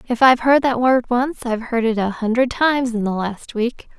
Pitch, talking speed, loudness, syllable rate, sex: 240 Hz, 240 wpm, -18 LUFS, 5.4 syllables/s, female